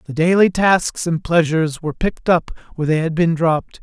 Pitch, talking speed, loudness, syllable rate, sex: 165 Hz, 205 wpm, -17 LUFS, 5.8 syllables/s, male